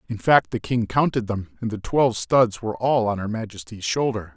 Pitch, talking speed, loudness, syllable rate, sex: 110 Hz, 220 wpm, -22 LUFS, 5.4 syllables/s, male